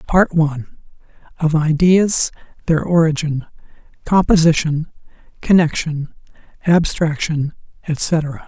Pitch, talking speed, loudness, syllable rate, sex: 160 Hz, 70 wpm, -17 LUFS, 3.9 syllables/s, male